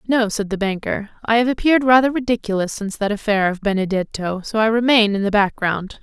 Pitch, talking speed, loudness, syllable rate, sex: 215 Hz, 200 wpm, -18 LUFS, 5.9 syllables/s, female